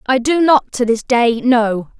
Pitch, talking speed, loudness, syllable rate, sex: 250 Hz, 210 wpm, -14 LUFS, 3.8 syllables/s, female